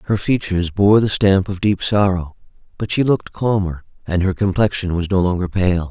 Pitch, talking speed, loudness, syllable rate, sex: 95 Hz, 195 wpm, -18 LUFS, 5.3 syllables/s, male